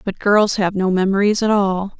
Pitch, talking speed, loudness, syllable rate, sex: 200 Hz, 210 wpm, -17 LUFS, 4.9 syllables/s, female